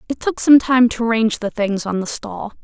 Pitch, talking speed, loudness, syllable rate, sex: 230 Hz, 250 wpm, -17 LUFS, 5.5 syllables/s, female